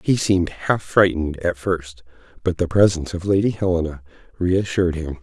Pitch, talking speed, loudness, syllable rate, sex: 90 Hz, 160 wpm, -20 LUFS, 5.5 syllables/s, male